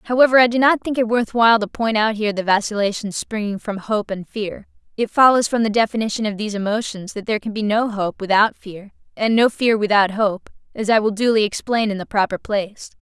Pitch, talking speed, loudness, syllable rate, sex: 215 Hz, 225 wpm, -19 LUFS, 5.8 syllables/s, female